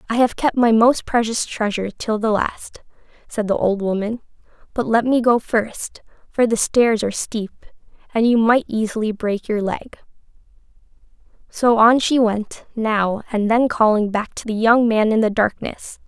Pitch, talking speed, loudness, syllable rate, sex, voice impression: 225 Hz, 175 wpm, -19 LUFS, 4.6 syllables/s, female, very feminine, young, slightly adult-like, tensed, slightly powerful, bright, slightly soft, clear, very fluent, slightly raspy, very cute, intellectual, very refreshing, very sincere, slightly calm, friendly, reassuring, very unique, very elegant, wild, very sweet, lively, kind, intense, slightly sharp, slightly modest, very light